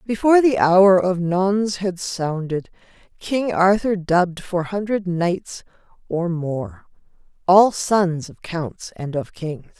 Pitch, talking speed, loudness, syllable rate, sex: 185 Hz, 135 wpm, -20 LUFS, 3.6 syllables/s, female